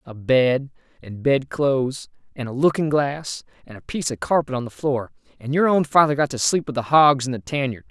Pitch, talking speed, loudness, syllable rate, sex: 135 Hz, 215 wpm, -21 LUFS, 5.2 syllables/s, male